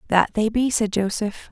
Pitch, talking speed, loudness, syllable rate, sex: 215 Hz, 200 wpm, -21 LUFS, 5.3 syllables/s, female